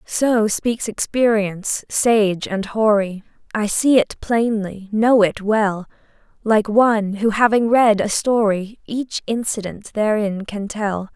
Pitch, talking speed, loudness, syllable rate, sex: 215 Hz, 135 wpm, -18 LUFS, 3.6 syllables/s, female